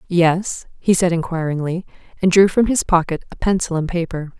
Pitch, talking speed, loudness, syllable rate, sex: 175 Hz, 180 wpm, -18 LUFS, 5.2 syllables/s, female